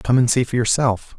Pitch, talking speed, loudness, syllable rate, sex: 120 Hz, 255 wpm, -18 LUFS, 5.2 syllables/s, male